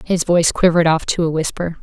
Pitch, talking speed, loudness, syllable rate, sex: 165 Hz, 230 wpm, -16 LUFS, 6.4 syllables/s, female